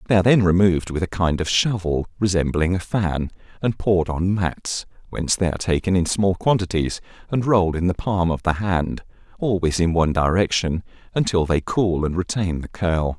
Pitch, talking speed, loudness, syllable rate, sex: 90 Hz, 190 wpm, -21 LUFS, 5.3 syllables/s, male